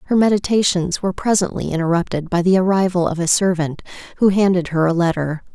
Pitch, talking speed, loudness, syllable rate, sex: 180 Hz, 175 wpm, -18 LUFS, 6.2 syllables/s, female